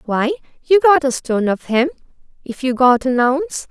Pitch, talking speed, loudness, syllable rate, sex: 275 Hz, 195 wpm, -16 LUFS, 5.1 syllables/s, female